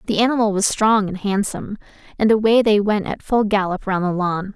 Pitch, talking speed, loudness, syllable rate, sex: 205 Hz, 210 wpm, -18 LUFS, 5.5 syllables/s, female